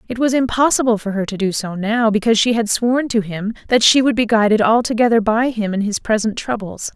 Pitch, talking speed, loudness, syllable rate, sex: 225 Hz, 235 wpm, -17 LUFS, 5.8 syllables/s, female